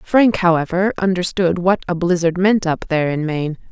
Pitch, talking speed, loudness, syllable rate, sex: 175 Hz, 180 wpm, -17 LUFS, 5.3 syllables/s, female